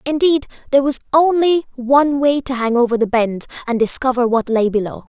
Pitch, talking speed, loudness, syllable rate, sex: 260 Hz, 185 wpm, -16 LUFS, 5.6 syllables/s, female